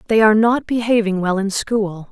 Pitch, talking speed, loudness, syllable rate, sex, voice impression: 210 Hz, 200 wpm, -17 LUFS, 5.3 syllables/s, female, feminine, adult-like, slightly tensed, powerful, slightly soft, clear, fluent, intellectual, friendly, elegant, lively, sharp